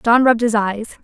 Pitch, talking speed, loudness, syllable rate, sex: 225 Hz, 230 wpm, -16 LUFS, 6.2 syllables/s, female